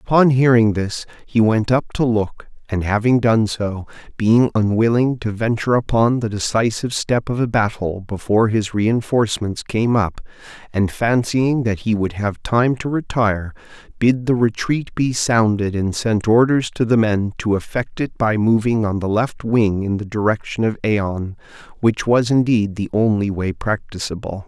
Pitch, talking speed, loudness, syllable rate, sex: 110 Hz, 170 wpm, -18 LUFS, 4.6 syllables/s, male